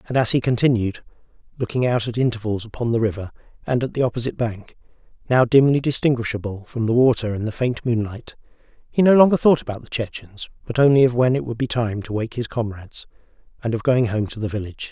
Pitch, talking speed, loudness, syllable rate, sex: 120 Hz, 210 wpm, -20 LUFS, 6.4 syllables/s, male